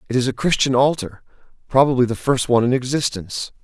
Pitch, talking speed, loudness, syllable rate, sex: 125 Hz, 165 wpm, -19 LUFS, 6.6 syllables/s, male